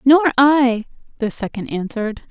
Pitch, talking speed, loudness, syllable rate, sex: 250 Hz, 130 wpm, -18 LUFS, 4.6 syllables/s, female